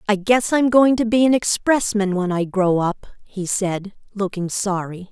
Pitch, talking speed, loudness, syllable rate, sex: 205 Hz, 190 wpm, -19 LUFS, 4.3 syllables/s, female